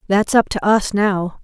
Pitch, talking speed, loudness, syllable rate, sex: 200 Hz, 210 wpm, -17 LUFS, 4.3 syllables/s, female